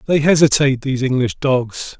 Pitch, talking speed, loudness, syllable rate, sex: 135 Hz, 150 wpm, -16 LUFS, 5.5 syllables/s, male